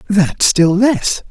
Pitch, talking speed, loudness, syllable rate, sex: 190 Hz, 140 wpm, -13 LUFS, 2.8 syllables/s, male